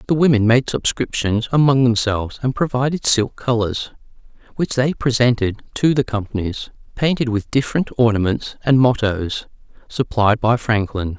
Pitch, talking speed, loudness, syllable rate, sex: 120 Hz, 135 wpm, -18 LUFS, 4.8 syllables/s, male